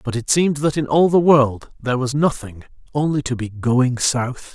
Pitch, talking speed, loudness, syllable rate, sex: 135 Hz, 210 wpm, -18 LUFS, 4.9 syllables/s, male